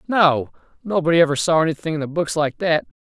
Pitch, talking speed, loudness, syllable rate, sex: 155 Hz, 200 wpm, -19 LUFS, 6.2 syllables/s, male